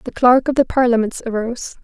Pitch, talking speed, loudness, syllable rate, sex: 240 Hz, 195 wpm, -17 LUFS, 6.2 syllables/s, female